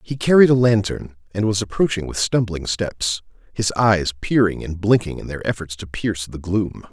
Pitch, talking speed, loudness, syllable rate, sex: 100 Hz, 190 wpm, -20 LUFS, 5.0 syllables/s, male